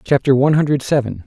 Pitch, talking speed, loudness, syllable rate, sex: 140 Hz, 190 wpm, -16 LUFS, 6.8 syllables/s, male